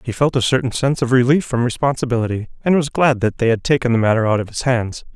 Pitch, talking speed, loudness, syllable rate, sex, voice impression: 125 Hz, 255 wpm, -17 LUFS, 6.6 syllables/s, male, masculine, adult-like, tensed, powerful, clear, fluent, cool, intellectual, refreshing, friendly, lively, kind